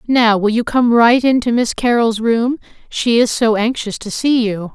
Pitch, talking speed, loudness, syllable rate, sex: 230 Hz, 215 wpm, -15 LUFS, 4.4 syllables/s, female